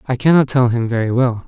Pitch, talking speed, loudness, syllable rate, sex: 125 Hz, 245 wpm, -15 LUFS, 5.9 syllables/s, male